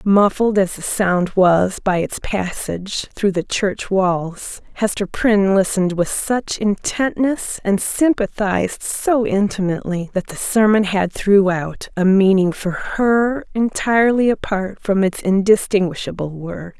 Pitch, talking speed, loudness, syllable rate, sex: 195 Hz, 130 wpm, -18 LUFS, 4.0 syllables/s, female